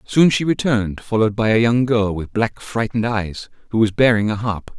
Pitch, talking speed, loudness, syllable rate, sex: 110 Hz, 215 wpm, -18 LUFS, 5.4 syllables/s, male